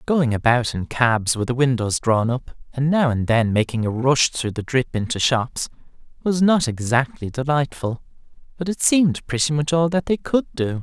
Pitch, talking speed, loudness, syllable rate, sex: 130 Hz, 195 wpm, -20 LUFS, 4.8 syllables/s, male